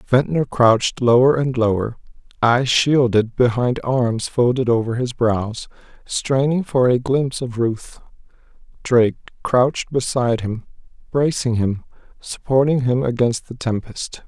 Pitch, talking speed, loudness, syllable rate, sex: 125 Hz, 125 wpm, -19 LUFS, 4.3 syllables/s, male